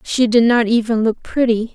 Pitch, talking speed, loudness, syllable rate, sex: 230 Hz, 205 wpm, -16 LUFS, 4.9 syllables/s, female